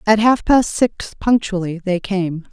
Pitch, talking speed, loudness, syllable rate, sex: 200 Hz, 165 wpm, -17 LUFS, 4.0 syllables/s, female